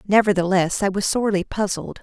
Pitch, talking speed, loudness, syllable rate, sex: 195 Hz, 150 wpm, -20 LUFS, 5.8 syllables/s, female